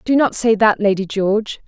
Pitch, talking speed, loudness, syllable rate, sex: 210 Hz, 215 wpm, -16 LUFS, 5.2 syllables/s, female